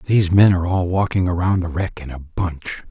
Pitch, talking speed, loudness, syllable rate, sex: 90 Hz, 230 wpm, -19 LUFS, 5.3 syllables/s, male